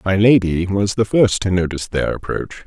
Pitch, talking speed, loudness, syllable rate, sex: 95 Hz, 200 wpm, -17 LUFS, 5.1 syllables/s, male